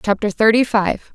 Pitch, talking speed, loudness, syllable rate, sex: 215 Hz, 155 wpm, -16 LUFS, 4.8 syllables/s, female